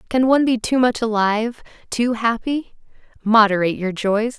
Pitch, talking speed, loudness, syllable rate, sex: 225 Hz, 150 wpm, -19 LUFS, 5.2 syllables/s, female